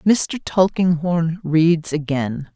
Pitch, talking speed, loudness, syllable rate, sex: 165 Hz, 95 wpm, -19 LUFS, 2.9 syllables/s, female